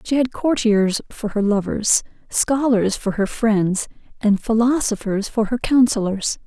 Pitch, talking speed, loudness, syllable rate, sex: 220 Hz, 140 wpm, -19 LUFS, 4.1 syllables/s, female